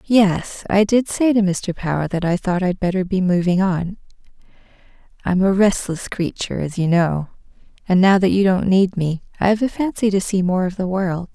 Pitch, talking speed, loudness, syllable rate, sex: 190 Hz, 200 wpm, -18 LUFS, 5.0 syllables/s, female